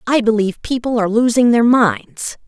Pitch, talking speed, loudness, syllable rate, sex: 225 Hz, 170 wpm, -15 LUFS, 5.3 syllables/s, female